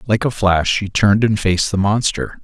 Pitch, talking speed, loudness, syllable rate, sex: 100 Hz, 220 wpm, -16 LUFS, 5.3 syllables/s, male